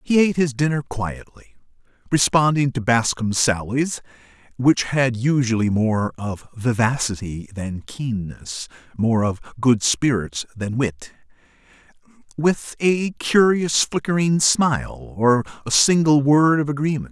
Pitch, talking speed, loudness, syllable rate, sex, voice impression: 130 Hz, 110 wpm, -20 LUFS, 4.1 syllables/s, male, very masculine, slightly old, slightly halting, slightly raspy, slightly mature, slightly wild